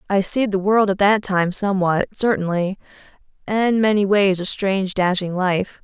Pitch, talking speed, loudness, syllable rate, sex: 195 Hz, 165 wpm, -19 LUFS, 4.7 syllables/s, female